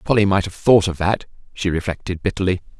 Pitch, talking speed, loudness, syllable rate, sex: 95 Hz, 195 wpm, -19 LUFS, 6.1 syllables/s, male